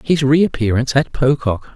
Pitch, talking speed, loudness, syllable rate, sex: 135 Hz, 135 wpm, -16 LUFS, 5.0 syllables/s, male